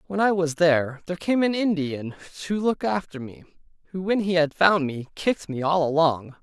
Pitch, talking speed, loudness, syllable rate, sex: 170 Hz, 205 wpm, -23 LUFS, 5.2 syllables/s, male